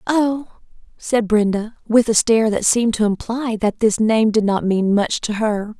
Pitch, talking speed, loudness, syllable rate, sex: 220 Hz, 195 wpm, -18 LUFS, 4.6 syllables/s, female